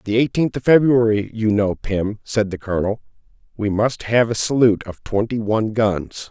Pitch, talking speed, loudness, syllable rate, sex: 110 Hz, 180 wpm, -19 LUFS, 5.0 syllables/s, male